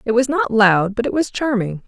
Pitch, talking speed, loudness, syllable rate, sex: 220 Hz, 255 wpm, -17 LUFS, 5.1 syllables/s, female